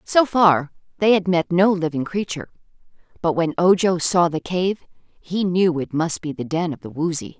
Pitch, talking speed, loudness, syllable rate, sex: 175 Hz, 195 wpm, -20 LUFS, 4.8 syllables/s, female